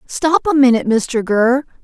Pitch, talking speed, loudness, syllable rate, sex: 255 Hz, 165 wpm, -14 LUFS, 4.6 syllables/s, female